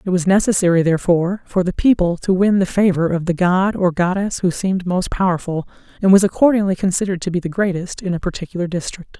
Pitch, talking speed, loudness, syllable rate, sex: 185 Hz, 210 wpm, -17 LUFS, 6.3 syllables/s, female